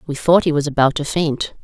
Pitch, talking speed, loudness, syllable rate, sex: 150 Hz, 255 wpm, -17 LUFS, 5.6 syllables/s, female